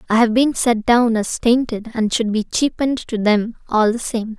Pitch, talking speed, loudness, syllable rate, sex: 230 Hz, 220 wpm, -18 LUFS, 4.8 syllables/s, female